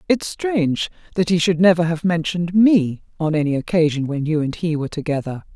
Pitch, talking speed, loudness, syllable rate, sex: 165 Hz, 195 wpm, -19 LUFS, 5.8 syllables/s, female